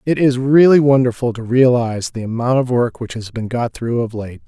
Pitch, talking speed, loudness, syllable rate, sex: 120 Hz, 230 wpm, -16 LUFS, 5.3 syllables/s, male